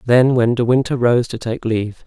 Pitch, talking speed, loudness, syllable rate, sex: 120 Hz, 235 wpm, -17 LUFS, 5.1 syllables/s, male